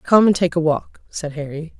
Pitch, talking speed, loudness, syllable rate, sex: 165 Hz, 235 wpm, -19 LUFS, 5.1 syllables/s, female